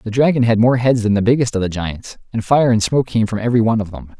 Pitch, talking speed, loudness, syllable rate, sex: 115 Hz, 300 wpm, -16 LUFS, 6.7 syllables/s, male